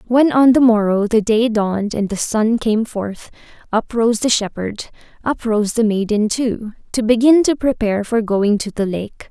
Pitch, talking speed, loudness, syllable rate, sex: 225 Hz, 195 wpm, -17 LUFS, 4.5 syllables/s, female